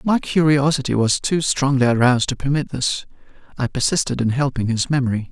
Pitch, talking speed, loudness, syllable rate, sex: 135 Hz, 170 wpm, -19 LUFS, 5.8 syllables/s, male